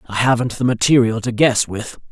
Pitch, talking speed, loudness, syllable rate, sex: 120 Hz, 200 wpm, -17 LUFS, 5.4 syllables/s, male